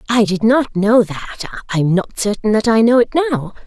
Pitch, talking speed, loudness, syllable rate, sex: 220 Hz, 230 wpm, -15 LUFS, 5.5 syllables/s, female